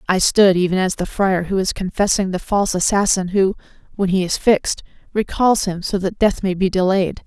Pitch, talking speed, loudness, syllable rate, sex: 190 Hz, 205 wpm, -18 LUFS, 5.3 syllables/s, female